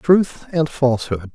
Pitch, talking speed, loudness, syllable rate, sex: 140 Hz, 135 wpm, -19 LUFS, 4.1 syllables/s, male